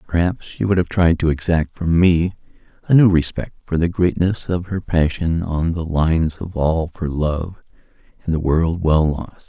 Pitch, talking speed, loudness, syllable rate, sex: 85 Hz, 195 wpm, -19 LUFS, 4.6 syllables/s, male